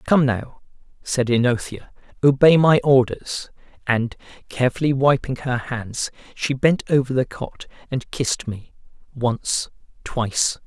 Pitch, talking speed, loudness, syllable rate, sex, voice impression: 130 Hz, 125 wpm, -21 LUFS, 4.1 syllables/s, male, masculine, adult-like, tensed, slightly powerful, bright, clear, fluent, intellectual, refreshing, friendly, slightly unique, slightly wild, lively, light